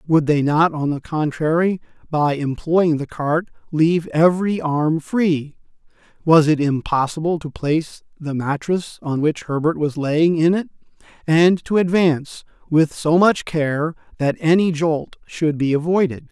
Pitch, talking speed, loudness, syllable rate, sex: 160 Hz, 150 wpm, -19 LUFS, 4.4 syllables/s, male